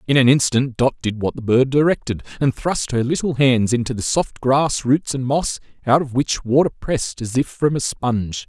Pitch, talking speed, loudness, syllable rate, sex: 130 Hz, 220 wpm, -19 LUFS, 5.1 syllables/s, male